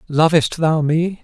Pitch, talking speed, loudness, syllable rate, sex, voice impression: 160 Hz, 145 wpm, -16 LUFS, 3.8 syllables/s, male, very masculine, adult-like, slightly middle-aged, slightly thick, tensed, powerful, slightly bright, slightly hard, clear, very fluent, slightly raspy, cool, intellectual, very refreshing, very sincere, slightly calm, friendly, reassuring, slightly unique, elegant, slightly sweet, lively, kind, slightly intense, slightly modest, slightly light